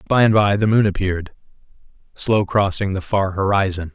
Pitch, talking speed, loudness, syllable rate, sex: 100 Hz, 165 wpm, -18 LUFS, 5.4 syllables/s, male